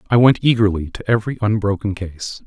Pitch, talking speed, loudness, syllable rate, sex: 105 Hz, 170 wpm, -18 LUFS, 6.0 syllables/s, male